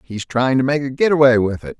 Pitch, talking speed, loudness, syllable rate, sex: 130 Hz, 265 wpm, -16 LUFS, 5.9 syllables/s, male